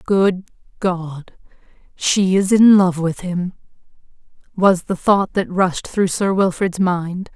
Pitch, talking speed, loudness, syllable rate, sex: 185 Hz, 140 wpm, -17 LUFS, 3.4 syllables/s, female